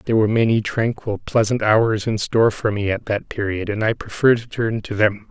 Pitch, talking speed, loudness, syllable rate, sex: 110 Hz, 225 wpm, -20 LUFS, 5.4 syllables/s, male